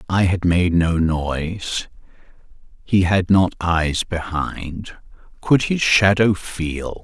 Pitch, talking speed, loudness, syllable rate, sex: 90 Hz, 110 wpm, -19 LUFS, 3.1 syllables/s, male